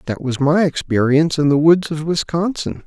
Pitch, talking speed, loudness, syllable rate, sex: 155 Hz, 190 wpm, -17 LUFS, 5.2 syllables/s, male